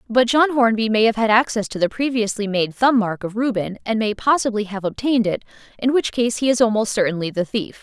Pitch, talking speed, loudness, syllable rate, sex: 225 Hz, 230 wpm, -19 LUFS, 5.8 syllables/s, female